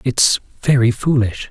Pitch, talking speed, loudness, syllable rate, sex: 125 Hz, 120 wpm, -16 LUFS, 4.2 syllables/s, male